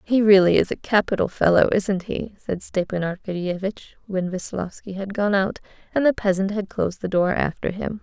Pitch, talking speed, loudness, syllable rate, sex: 195 Hz, 185 wpm, -22 LUFS, 5.3 syllables/s, female